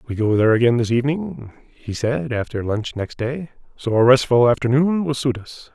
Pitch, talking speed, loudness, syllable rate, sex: 120 Hz, 200 wpm, -19 LUFS, 5.3 syllables/s, male